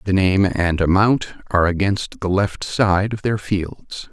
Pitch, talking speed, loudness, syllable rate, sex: 95 Hz, 175 wpm, -19 LUFS, 4.3 syllables/s, male